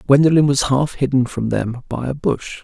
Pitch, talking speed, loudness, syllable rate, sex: 135 Hz, 205 wpm, -18 LUFS, 5.0 syllables/s, male